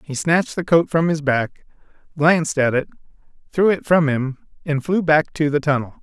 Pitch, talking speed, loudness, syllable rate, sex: 150 Hz, 200 wpm, -19 LUFS, 5.2 syllables/s, male